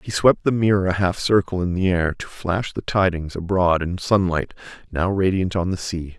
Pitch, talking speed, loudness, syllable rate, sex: 90 Hz, 215 wpm, -21 LUFS, 4.9 syllables/s, male